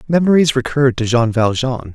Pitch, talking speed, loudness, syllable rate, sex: 130 Hz, 155 wpm, -15 LUFS, 5.6 syllables/s, male